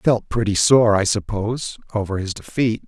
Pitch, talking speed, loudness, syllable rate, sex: 105 Hz, 165 wpm, -20 LUFS, 4.9 syllables/s, male